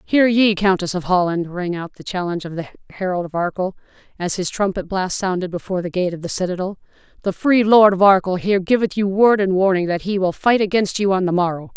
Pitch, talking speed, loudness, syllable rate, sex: 190 Hz, 230 wpm, -18 LUFS, 5.9 syllables/s, female